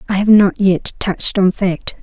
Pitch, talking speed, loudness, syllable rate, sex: 195 Hz, 210 wpm, -14 LUFS, 4.5 syllables/s, female